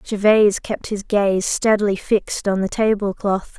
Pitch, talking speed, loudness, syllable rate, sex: 205 Hz, 165 wpm, -19 LUFS, 4.7 syllables/s, female